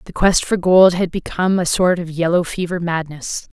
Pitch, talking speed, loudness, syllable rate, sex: 175 Hz, 205 wpm, -17 LUFS, 5.0 syllables/s, female